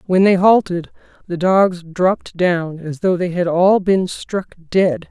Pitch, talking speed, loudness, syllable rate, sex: 180 Hz, 175 wpm, -17 LUFS, 3.8 syllables/s, female